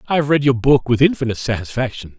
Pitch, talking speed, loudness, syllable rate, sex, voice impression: 125 Hz, 220 wpm, -17 LUFS, 6.8 syllables/s, male, very masculine, very adult-like, very middle-aged, very thick, tensed, powerful, bright, slightly soft, slightly muffled, fluent, cool, very intellectual, sincere, calm, very mature, very friendly, very reassuring, unique, elegant, very wild, lively, kind, slightly modest